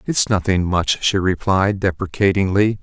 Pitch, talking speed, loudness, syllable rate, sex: 95 Hz, 125 wpm, -18 LUFS, 4.5 syllables/s, male